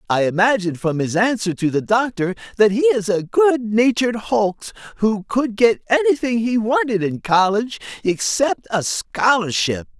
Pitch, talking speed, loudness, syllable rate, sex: 220 Hz, 150 wpm, -18 LUFS, 4.7 syllables/s, male